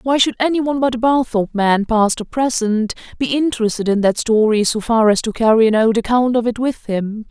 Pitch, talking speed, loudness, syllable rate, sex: 230 Hz, 230 wpm, -16 LUFS, 5.7 syllables/s, female